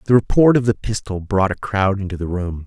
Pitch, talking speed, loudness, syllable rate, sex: 100 Hz, 250 wpm, -18 LUFS, 5.6 syllables/s, male